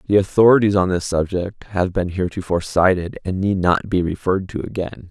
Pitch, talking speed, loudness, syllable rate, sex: 95 Hz, 190 wpm, -19 LUFS, 5.7 syllables/s, male